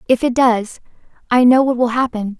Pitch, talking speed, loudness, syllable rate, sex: 240 Hz, 200 wpm, -15 LUFS, 5.3 syllables/s, female